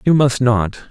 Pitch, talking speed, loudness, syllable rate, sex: 125 Hz, 200 wpm, -16 LUFS, 4.5 syllables/s, male